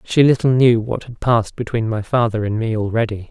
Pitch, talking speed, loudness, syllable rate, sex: 115 Hz, 220 wpm, -18 LUFS, 5.6 syllables/s, male